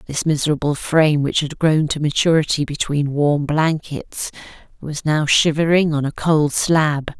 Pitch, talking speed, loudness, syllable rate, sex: 150 Hz, 150 wpm, -18 LUFS, 4.5 syllables/s, female